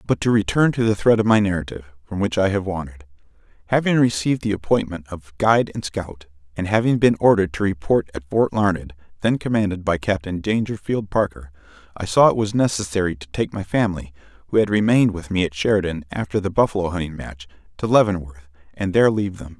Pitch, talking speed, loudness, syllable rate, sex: 95 Hz, 190 wpm, -20 LUFS, 6.2 syllables/s, male